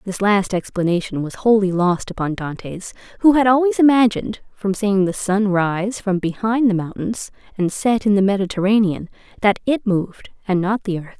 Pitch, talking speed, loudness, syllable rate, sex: 200 Hz, 175 wpm, -18 LUFS, 5.0 syllables/s, female